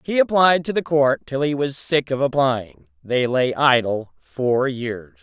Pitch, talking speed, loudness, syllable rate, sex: 135 Hz, 185 wpm, -20 LUFS, 4.0 syllables/s, male